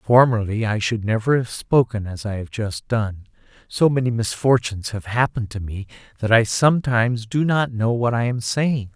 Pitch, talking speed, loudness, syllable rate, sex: 115 Hz, 190 wpm, -20 LUFS, 5.0 syllables/s, male